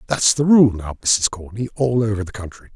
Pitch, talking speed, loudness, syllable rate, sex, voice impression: 110 Hz, 220 wpm, -18 LUFS, 5.5 syllables/s, male, very masculine, very adult-like, thick, cool, calm, elegant